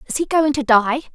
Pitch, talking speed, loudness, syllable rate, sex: 270 Hz, 260 wpm, -17 LUFS, 6.1 syllables/s, female